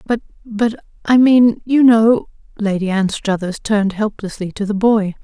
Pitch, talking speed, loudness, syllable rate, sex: 215 Hz, 115 wpm, -16 LUFS, 4.4 syllables/s, female